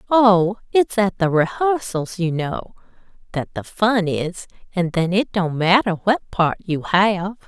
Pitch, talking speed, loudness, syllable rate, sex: 190 Hz, 160 wpm, -19 LUFS, 3.7 syllables/s, female